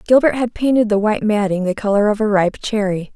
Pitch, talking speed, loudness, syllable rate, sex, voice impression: 210 Hz, 230 wpm, -17 LUFS, 6.1 syllables/s, female, feminine, slightly young, relaxed, bright, soft, raspy, cute, slightly refreshing, friendly, reassuring, kind, modest